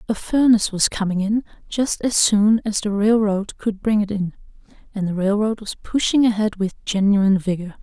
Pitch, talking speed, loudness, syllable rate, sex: 210 Hz, 185 wpm, -19 LUFS, 5.1 syllables/s, female